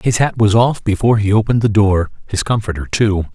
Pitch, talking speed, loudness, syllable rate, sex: 105 Hz, 215 wpm, -15 LUFS, 5.9 syllables/s, male